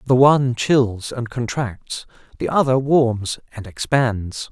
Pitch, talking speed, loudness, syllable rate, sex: 120 Hz, 135 wpm, -19 LUFS, 3.7 syllables/s, male